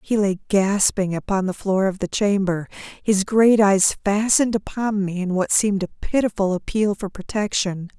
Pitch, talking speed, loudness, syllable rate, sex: 200 Hz, 175 wpm, -20 LUFS, 4.8 syllables/s, female